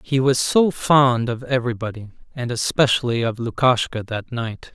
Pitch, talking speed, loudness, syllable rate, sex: 125 Hz, 150 wpm, -20 LUFS, 4.8 syllables/s, male